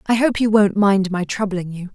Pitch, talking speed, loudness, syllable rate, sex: 200 Hz, 245 wpm, -18 LUFS, 4.9 syllables/s, female